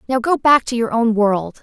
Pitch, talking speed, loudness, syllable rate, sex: 235 Hz, 260 wpm, -16 LUFS, 4.8 syllables/s, female